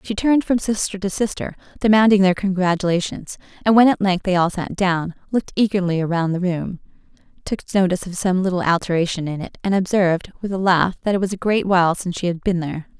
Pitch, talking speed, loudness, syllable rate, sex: 185 Hz, 210 wpm, -19 LUFS, 6.1 syllables/s, female